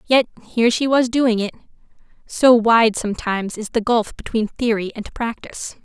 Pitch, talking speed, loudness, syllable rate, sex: 230 Hz, 165 wpm, -19 LUFS, 5.2 syllables/s, female